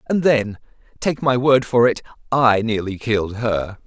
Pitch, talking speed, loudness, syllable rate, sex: 120 Hz, 170 wpm, -19 LUFS, 4.4 syllables/s, male